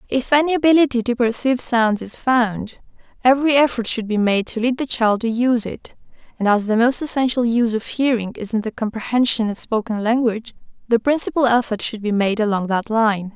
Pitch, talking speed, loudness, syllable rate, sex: 235 Hz, 200 wpm, -18 LUFS, 5.7 syllables/s, female